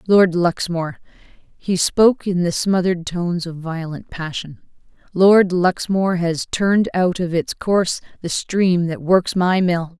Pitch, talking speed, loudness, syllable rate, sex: 180 Hz, 150 wpm, -18 LUFS, 4.2 syllables/s, female